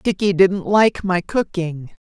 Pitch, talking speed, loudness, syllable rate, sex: 185 Hz, 145 wpm, -18 LUFS, 3.6 syllables/s, female